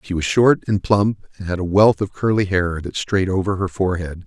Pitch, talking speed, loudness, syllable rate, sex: 95 Hz, 240 wpm, -19 LUFS, 5.3 syllables/s, male